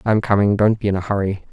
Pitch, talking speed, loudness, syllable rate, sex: 100 Hz, 275 wpm, -18 LUFS, 6.6 syllables/s, male